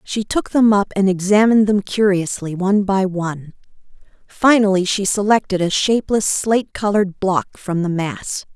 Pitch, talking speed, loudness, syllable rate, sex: 195 Hz, 155 wpm, -17 LUFS, 5.0 syllables/s, female